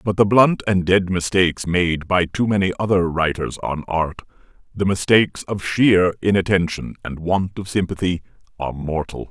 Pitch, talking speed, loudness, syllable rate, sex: 90 Hz, 150 wpm, -19 LUFS, 4.9 syllables/s, male